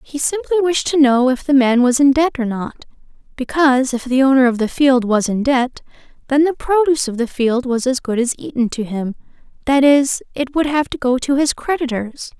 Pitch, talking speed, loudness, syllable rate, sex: 265 Hz, 225 wpm, -16 LUFS, 5.4 syllables/s, female